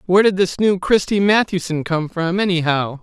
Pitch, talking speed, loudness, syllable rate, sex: 180 Hz, 180 wpm, -17 LUFS, 5.2 syllables/s, male